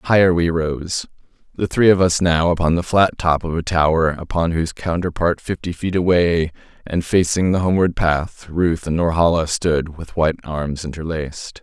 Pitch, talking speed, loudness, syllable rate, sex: 85 Hz, 175 wpm, -19 LUFS, 4.9 syllables/s, male